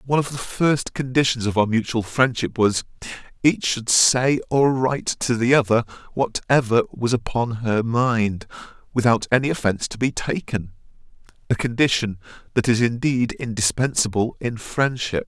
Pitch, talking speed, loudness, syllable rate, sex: 120 Hz, 145 wpm, -21 LUFS, 4.8 syllables/s, male